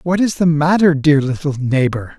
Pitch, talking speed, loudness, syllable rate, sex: 150 Hz, 190 wpm, -15 LUFS, 4.8 syllables/s, male